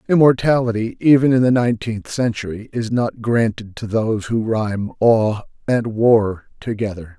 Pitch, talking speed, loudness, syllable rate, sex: 115 Hz, 140 wpm, -18 LUFS, 4.8 syllables/s, male